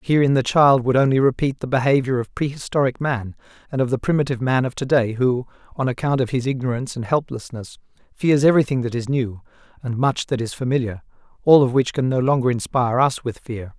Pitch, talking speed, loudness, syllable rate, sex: 130 Hz, 200 wpm, -20 LUFS, 6.1 syllables/s, male